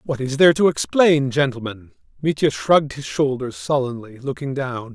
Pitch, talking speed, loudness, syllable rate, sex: 135 Hz, 160 wpm, -20 LUFS, 5.1 syllables/s, male